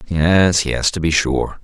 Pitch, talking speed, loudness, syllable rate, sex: 85 Hz, 185 wpm, -16 LUFS, 3.5 syllables/s, male